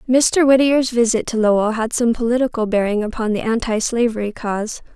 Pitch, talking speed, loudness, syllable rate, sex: 230 Hz, 155 wpm, -18 LUFS, 5.6 syllables/s, female